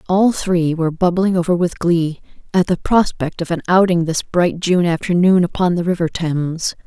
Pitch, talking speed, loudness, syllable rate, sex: 175 Hz, 185 wpm, -17 LUFS, 4.9 syllables/s, female